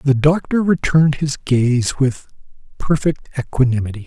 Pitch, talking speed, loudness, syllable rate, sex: 140 Hz, 120 wpm, -17 LUFS, 4.8 syllables/s, male